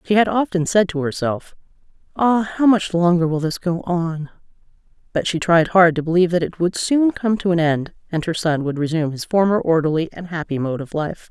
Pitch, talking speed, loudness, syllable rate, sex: 175 Hz, 220 wpm, -19 LUFS, 5.4 syllables/s, female